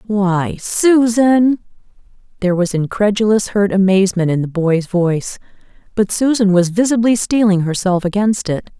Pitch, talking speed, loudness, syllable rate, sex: 200 Hz, 130 wpm, -15 LUFS, 4.7 syllables/s, female